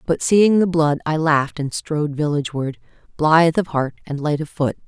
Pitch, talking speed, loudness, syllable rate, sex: 155 Hz, 195 wpm, -19 LUFS, 5.5 syllables/s, female